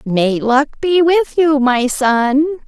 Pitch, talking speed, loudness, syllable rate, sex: 280 Hz, 155 wpm, -14 LUFS, 2.9 syllables/s, female